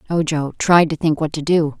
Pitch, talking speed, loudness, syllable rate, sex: 155 Hz, 235 wpm, -17 LUFS, 5.3 syllables/s, female